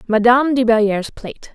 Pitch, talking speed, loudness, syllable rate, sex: 230 Hz, 155 wpm, -15 LUFS, 6.5 syllables/s, female